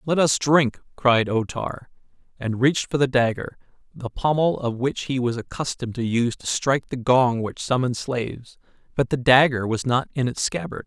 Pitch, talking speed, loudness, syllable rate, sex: 125 Hz, 195 wpm, -22 LUFS, 5.1 syllables/s, male